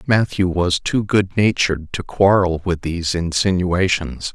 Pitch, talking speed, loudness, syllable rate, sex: 90 Hz, 140 wpm, -18 LUFS, 4.3 syllables/s, male